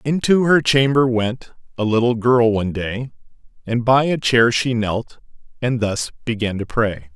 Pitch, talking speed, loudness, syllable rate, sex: 120 Hz, 170 wpm, -18 LUFS, 4.5 syllables/s, male